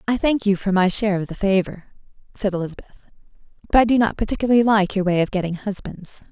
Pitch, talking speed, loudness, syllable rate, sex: 200 Hz, 210 wpm, -20 LUFS, 6.9 syllables/s, female